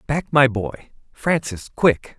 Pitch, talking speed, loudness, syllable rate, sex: 130 Hz, 135 wpm, -20 LUFS, 3.3 syllables/s, male